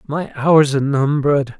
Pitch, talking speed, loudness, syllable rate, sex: 145 Hz, 150 wpm, -16 LUFS, 4.8 syllables/s, male